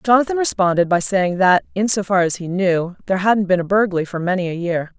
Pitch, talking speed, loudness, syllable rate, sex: 190 Hz, 240 wpm, -18 LUFS, 6.0 syllables/s, female